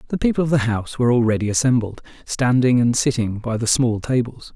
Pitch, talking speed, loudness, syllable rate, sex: 120 Hz, 200 wpm, -19 LUFS, 6.1 syllables/s, male